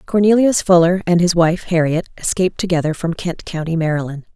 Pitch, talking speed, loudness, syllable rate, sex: 175 Hz, 165 wpm, -16 LUFS, 5.7 syllables/s, female